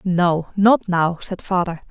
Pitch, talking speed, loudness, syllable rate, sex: 180 Hz, 160 wpm, -19 LUFS, 3.6 syllables/s, female